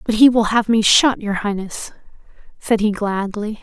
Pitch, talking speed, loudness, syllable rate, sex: 215 Hz, 180 wpm, -17 LUFS, 4.6 syllables/s, female